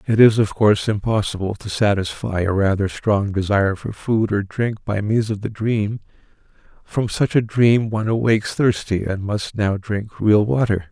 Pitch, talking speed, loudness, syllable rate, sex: 105 Hz, 180 wpm, -19 LUFS, 4.7 syllables/s, male